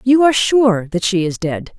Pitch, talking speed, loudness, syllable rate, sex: 210 Hz, 235 wpm, -15 LUFS, 4.9 syllables/s, female